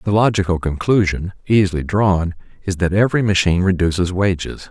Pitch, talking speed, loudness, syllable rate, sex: 95 Hz, 140 wpm, -17 LUFS, 5.7 syllables/s, male